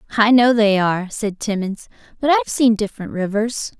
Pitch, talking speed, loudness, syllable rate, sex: 215 Hz, 175 wpm, -18 LUFS, 5.7 syllables/s, female